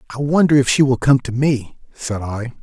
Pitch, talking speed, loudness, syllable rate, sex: 130 Hz, 230 wpm, -17 LUFS, 5.0 syllables/s, male